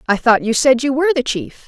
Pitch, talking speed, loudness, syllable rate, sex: 260 Hz, 285 wpm, -15 LUFS, 6.2 syllables/s, female